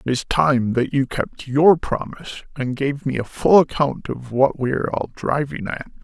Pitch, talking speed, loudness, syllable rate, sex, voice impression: 135 Hz, 210 wpm, -20 LUFS, 4.6 syllables/s, male, masculine, slightly old, slightly powerful, slightly hard, muffled, raspy, calm, mature, slightly friendly, kind, slightly modest